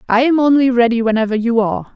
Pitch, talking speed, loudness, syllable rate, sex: 240 Hz, 215 wpm, -14 LUFS, 6.8 syllables/s, female